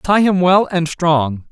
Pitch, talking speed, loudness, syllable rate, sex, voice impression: 170 Hz, 200 wpm, -15 LUFS, 3.4 syllables/s, male, very masculine, slightly middle-aged, slightly thick, slightly tensed, powerful, bright, soft, slightly clear, slightly fluent, raspy, slightly cool, intellectual, refreshing, sincere, calm, slightly mature, slightly friendly, reassuring, slightly unique, slightly elegant, wild, slightly sweet, lively, slightly strict, slightly intense, sharp, slightly light